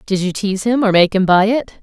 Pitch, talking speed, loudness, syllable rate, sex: 205 Hz, 295 wpm, -15 LUFS, 6.2 syllables/s, female